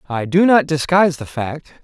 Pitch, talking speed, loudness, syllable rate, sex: 150 Hz, 195 wpm, -16 LUFS, 5.1 syllables/s, male